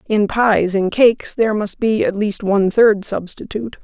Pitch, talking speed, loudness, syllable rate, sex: 210 Hz, 190 wpm, -16 LUFS, 4.9 syllables/s, female